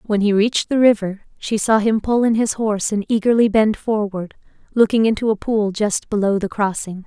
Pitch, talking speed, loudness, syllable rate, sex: 215 Hz, 205 wpm, -18 LUFS, 5.2 syllables/s, female